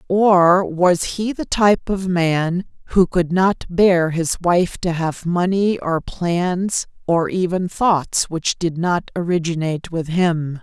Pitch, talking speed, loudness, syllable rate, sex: 175 Hz, 150 wpm, -18 LUFS, 3.4 syllables/s, female